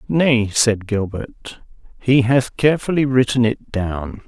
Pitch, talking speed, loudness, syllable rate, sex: 120 Hz, 125 wpm, -18 LUFS, 4.2 syllables/s, male